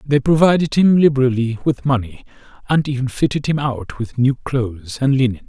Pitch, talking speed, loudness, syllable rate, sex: 130 Hz, 175 wpm, -17 LUFS, 5.4 syllables/s, male